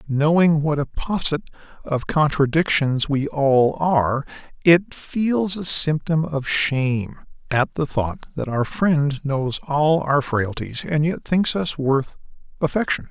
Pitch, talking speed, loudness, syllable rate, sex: 150 Hz, 140 wpm, -20 LUFS, 3.7 syllables/s, male